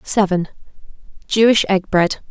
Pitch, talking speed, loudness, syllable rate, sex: 195 Hz, 80 wpm, -16 LUFS, 4.6 syllables/s, female